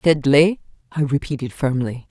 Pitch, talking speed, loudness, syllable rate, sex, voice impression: 140 Hz, 115 wpm, -19 LUFS, 4.6 syllables/s, female, feminine, adult-like, tensed, powerful, bright, clear, intellectual, friendly, lively, intense